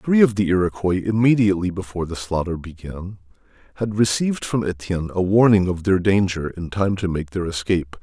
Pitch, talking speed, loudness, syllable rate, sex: 95 Hz, 180 wpm, -20 LUFS, 5.8 syllables/s, male